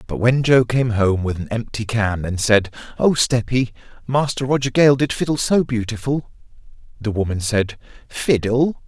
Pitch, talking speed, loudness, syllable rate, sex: 120 Hz, 160 wpm, -19 LUFS, 4.6 syllables/s, male